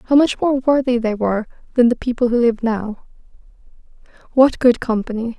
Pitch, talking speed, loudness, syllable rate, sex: 240 Hz, 155 wpm, -17 LUFS, 5.4 syllables/s, female